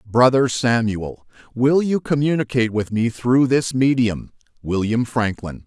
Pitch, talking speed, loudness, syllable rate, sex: 120 Hz, 115 wpm, -19 LUFS, 4.2 syllables/s, male